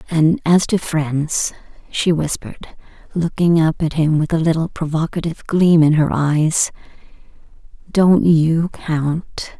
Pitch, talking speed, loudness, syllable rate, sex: 160 Hz, 130 wpm, -17 LUFS, 4.0 syllables/s, female